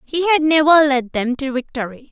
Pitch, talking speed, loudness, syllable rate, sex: 280 Hz, 200 wpm, -16 LUFS, 5.3 syllables/s, female